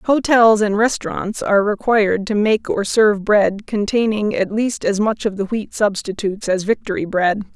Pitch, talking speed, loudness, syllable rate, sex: 210 Hz, 175 wpm, -17 LUFS, 4.9 syllables/s, female